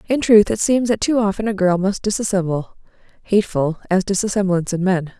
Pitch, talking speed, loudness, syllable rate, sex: 200 Hz, 175 wpm, -18 LUFS, 5.4 syllables/s, female